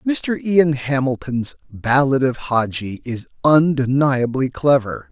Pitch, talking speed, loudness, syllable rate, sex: 135 Hz, 105 wpm, -18 LUFS, 3.9 syllables/s, male